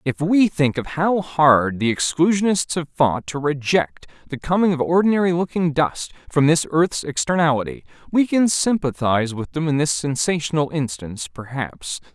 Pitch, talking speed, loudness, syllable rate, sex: 150 Hz, 160 wpm, -20 LUFS, 4.9 syllables/s, male